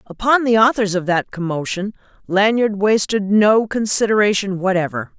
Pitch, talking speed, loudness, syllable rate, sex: 205 Hz, 125 wpm, -17 LUFS, 4.9 syllables/s, female